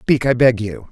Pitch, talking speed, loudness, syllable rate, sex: 120 Hz, 260 wpm, -16 LUFS, 4.6 syllables/s, male